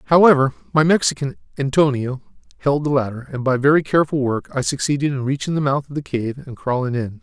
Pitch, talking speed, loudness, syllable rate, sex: 140 Hz, 200 wpm, -19 LUFS, 6.2 syllables/s, male